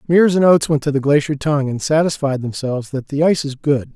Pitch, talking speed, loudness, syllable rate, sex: 145 Hz, 245 wpm, -17 LUFS, 6.7 syllables/s, male